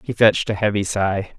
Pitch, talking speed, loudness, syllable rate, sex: 100 Hz, 215 wpm, -19 LUFS, 5.7 syllables/s, male